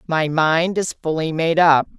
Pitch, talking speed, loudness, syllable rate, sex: 160 Hz, 180 wpm, -18 LUFS, 4.2 syllables/s, female